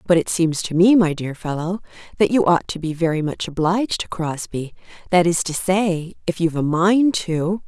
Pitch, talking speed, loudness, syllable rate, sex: 175 Hz, 205 wpm, -20 LUFS, 5.0 syllables/s, female